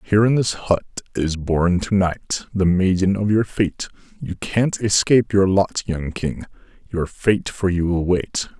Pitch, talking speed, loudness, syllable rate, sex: 95 Hz, 180 wpm, -20 LUFS, 4.2 syllables/s, male